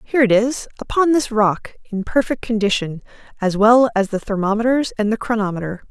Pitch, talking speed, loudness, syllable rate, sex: 220 Hz, 175 wpm, -18 LUFS, 5.6 syllables/s, female